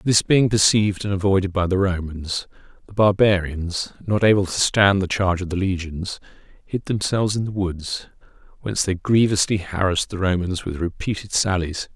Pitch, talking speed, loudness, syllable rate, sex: 95 Hz, 165 wpm, -21 LUFS, 5.2 syllables/s, male